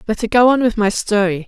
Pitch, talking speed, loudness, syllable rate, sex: 215 Hz, 285 wpm, -15 LUFS, 5.9 syllables/s, female